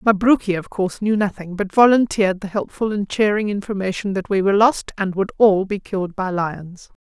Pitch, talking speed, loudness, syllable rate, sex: 200 Hz, 195 wpm, -19 LUFS, 5.6 syllables/s, female